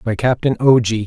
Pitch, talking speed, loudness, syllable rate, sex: 120 Hz, 225 wpm, -15 LUFS, 5.4 syllables/s, male